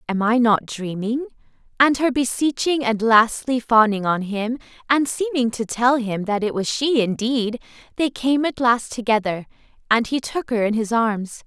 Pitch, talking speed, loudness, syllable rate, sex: 235 Hz, 180 wpm, -20 LUFS, 4.5 syllables/s, female